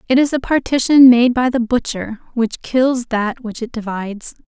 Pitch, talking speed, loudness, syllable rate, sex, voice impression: 240 Hz, 190 wpm, -16 LUFS, 4.7 syllables/s, female, very feminine, young, slightly adult-like, very thin, slightly tensed, slightly weak, very bright, soft, very clear, fluent, very cute, intellectual, very refreshing, sincere, very calm, very friendly, very reassuring, very unique, very elegant, slightly wild, very sweet, lively, very kind, slightly sharp, slightly modest, very light